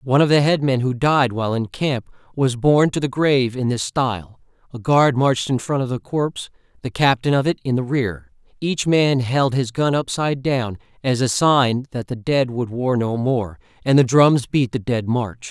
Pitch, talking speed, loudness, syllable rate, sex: 130 Hz, 230 wpm, -19 LUFS, 4.8 syllables/s, male